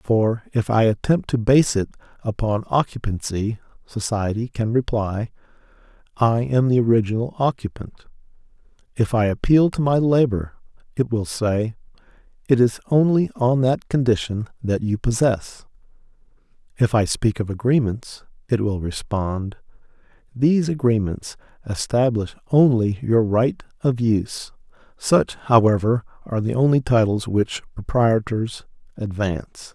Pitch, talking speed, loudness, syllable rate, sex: 115 Hz, 120 wpm, -21 LUFS, 4.5 syllables/s, male